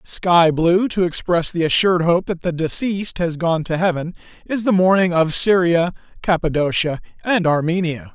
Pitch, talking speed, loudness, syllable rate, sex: 175 Hz, 160 wpm, -18 LUFS, 4.9 syllables/s, male